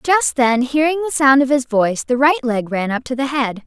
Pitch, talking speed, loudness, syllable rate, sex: 265 Hz, 260 wpm, -16 LUFS, 5.2 syllables/s, female